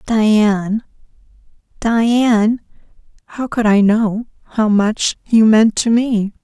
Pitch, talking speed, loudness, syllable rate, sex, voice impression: 220 Hz, 110 wpm, -15 LUFS, 3.4 syllables/s, female, feminine, slightly gender-neutral, slightly young, adult-like, slightly thin, very relaxed, very dark, slightly soft, muffled, fluent, slightly raspy, very cute, intellectual, sincere, very calm, very friendly, very reassuring, sweet, kind, very modest